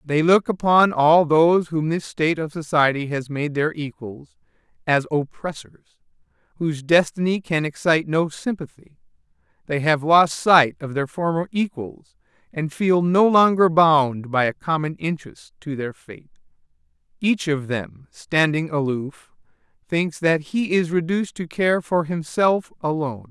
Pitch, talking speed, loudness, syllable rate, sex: 160 Hz, 145 wpm, -20 LUFS, 4.4 syllables/s, male